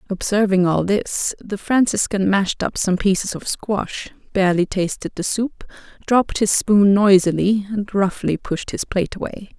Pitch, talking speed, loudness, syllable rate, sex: 200 Hz, 155 wpm, -19 LUFS, 4.6 syllables/s, female